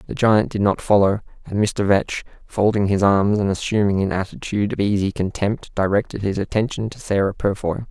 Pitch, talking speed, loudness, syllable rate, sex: 100 Hz, 180 wpm, -20 LUFS, 5.4 syllables/s, male